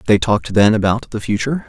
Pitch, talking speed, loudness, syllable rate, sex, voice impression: 110 Hz, 215 wpm, -16 LUFS, 6.6 syllables/s, male, masculine, adult-like, tensed, powerful, clear, slightly nasal, cool, intellectual, calm, friendly, reassuring, wild, lively, slightly strict